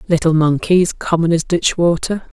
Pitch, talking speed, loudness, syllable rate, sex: 170 Hz, 125 wpm, -16 LUFS, 4.7 syllables/s, female